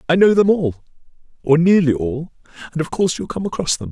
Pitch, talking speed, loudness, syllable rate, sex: 165 Hz, 215 wpm, -17 LUFS, 6.2 syllables/s, male